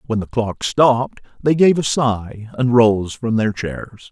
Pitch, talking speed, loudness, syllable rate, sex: 115 Hz, 190 wpm, -17 LUFS, 3.8 syllables/s, male